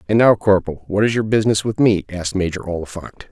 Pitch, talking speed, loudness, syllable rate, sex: 100 Hz, 215 wpm, -18 LUFS, 6.5 syllables/s, male